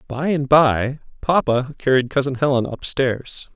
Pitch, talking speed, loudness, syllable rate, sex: 135 Hz, 150 wpm, -19 LUFS, 4.2 syllables/s, male